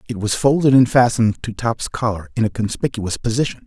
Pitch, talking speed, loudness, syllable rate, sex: 115 Hz, 195 wpm, -18 LUFS, 5.8 syllables/s, male